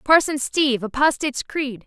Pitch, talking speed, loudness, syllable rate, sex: 270 Hz, 130 wpm, -20 LUFS, 5.1 syllables/s, female